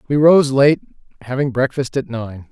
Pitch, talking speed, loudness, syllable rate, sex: 130 Hz, 165 wpm, -16 LUFS, 4.8 syllables/s, male